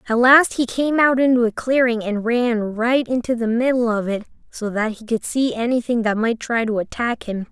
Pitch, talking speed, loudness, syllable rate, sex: 235 Hz, 225 wpm, -19 LUFS, 5.0 syllables/s, female